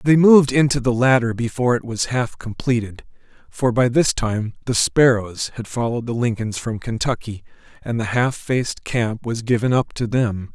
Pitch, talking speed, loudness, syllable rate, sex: 120 Hz, 180 wpm, -19 LUFS, 5.0 syllables/s, male